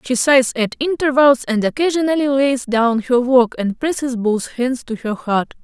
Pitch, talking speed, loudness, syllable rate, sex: 255 Hz, 180 wpm, -17 LUFS, 4.4 syllables/s, female